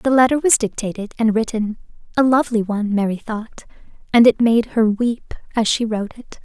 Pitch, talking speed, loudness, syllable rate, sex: 225 Hz, 170 wpm, -18 LUFS, 5.5 syllables/s, female